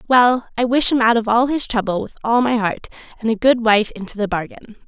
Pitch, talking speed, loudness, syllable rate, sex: 230 Hz, 245 wpm, -17 LUFS, 5.6 syllables/s, female